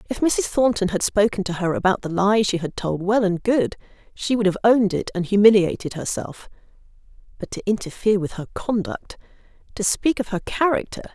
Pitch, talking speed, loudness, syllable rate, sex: 200 Hz, 180 wpm, -21 LUFS, 5.6 syllables/s, female